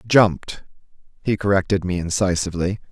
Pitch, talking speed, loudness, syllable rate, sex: 95 Hz, 105 wpm, -20 LUFS, 5.7 syllables/s, male